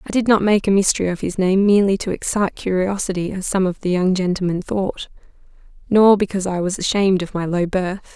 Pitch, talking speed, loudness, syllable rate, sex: 190 Hz, 215 wpm, -18 LUFS, 6.2 syllables/s, female